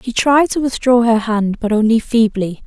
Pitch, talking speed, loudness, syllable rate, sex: 230 Hz, 200 wpm, -15 LUFS, 4.6 syllables/s, female